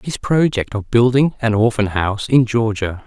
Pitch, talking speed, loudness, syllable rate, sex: 115 Hz, 175 wpm, -17 LUFS, 4.9 syllables/s, male